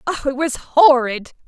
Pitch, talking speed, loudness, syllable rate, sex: 275 Hz, 165 wpm, -16 LUFS, 4.4 syllables/s, female